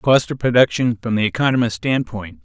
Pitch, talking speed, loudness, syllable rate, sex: 115 Hz, 170 wpm, -18 LUFS, 5.5 syllables/s, male